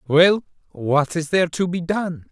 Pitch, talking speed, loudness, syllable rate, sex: 170 Hz, 180 wpm, -20 LUFS, 4.3 syllables/s, male